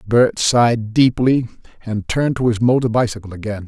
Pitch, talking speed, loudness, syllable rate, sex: 115 Hz, 165 wpm, -17 LUFS, 5.3 syllables/s, male